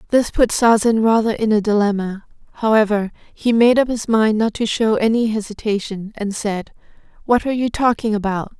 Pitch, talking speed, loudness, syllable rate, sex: 220 Hz, 175 wpm, -18 LUFS, 5.2 syllables/s, female